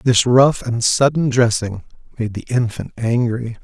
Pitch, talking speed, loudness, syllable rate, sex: 120 Hz, 150 wpm, -17 LUFS, 4.2 syllables/s, male